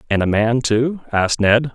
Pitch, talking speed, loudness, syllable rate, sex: 120 Hz, 205 wpm, -17 LUFS, 4.8 syllables/s, male